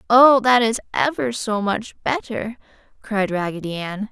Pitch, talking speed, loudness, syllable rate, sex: 215 Hz, 145 wpm, -20 LUFS, 4.5 syllables/s, female